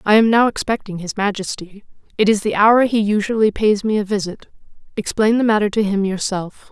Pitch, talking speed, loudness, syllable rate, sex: 210 Hz, 195 wpm, -17 LUFS, 5.5 syllables/s, female